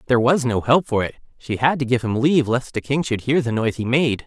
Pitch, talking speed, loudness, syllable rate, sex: 125 Hz, 295 wpm, -20 LUFS, 6.3 syllables/s, male